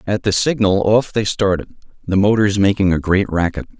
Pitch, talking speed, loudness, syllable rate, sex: 100 Hz, 190 wpm, -16 LUFS, 5.2 syllables/s, male